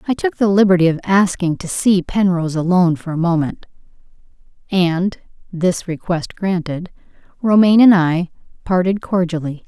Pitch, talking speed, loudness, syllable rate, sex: 180 Hz, 135 wpm, -16 LUFS, 5.0 syllables/s, female